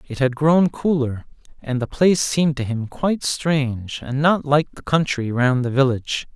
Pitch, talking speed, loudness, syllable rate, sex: 140 Hz, 190 wpm, -20 LUFS, 4.8 syllables/s, male